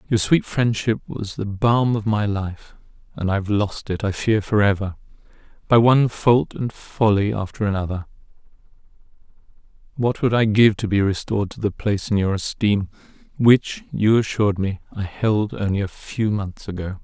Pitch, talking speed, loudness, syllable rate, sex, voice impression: 105 Hz, 175 wpm, -21 LUFS, 4.9 syllables/s, male, masculine, middle-aged, tensed, powerful, soft, clear, cool, intellectual, mature, friendly, reassuring, slightly wild, kind, modest